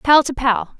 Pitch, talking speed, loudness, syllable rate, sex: 255 Hz, 225 wpm, -17 LUFS, 4.1 syllables/s, female